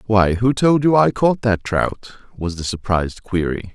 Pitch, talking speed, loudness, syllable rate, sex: 105 Hz, 190 wpm, -18 LUFS, 4.4 syllables/s, male